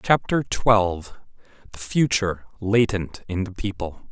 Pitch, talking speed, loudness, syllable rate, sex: 100 Hz, 100 wpm, -23 LUFS, 4.2 syllables/s, male